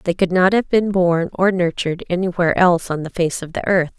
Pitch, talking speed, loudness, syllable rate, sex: 180 Hz, 240 wpm, -18 LUFS, 5.9 syllables/s, female